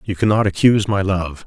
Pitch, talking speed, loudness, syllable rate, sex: 100 Hz, 205 wpm, -17 LUFS, 5.8 syllables/s, male